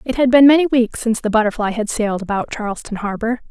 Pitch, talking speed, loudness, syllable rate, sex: 225 Hz, 225 wpm, -17 LUFS, 6.6 syllables/s, female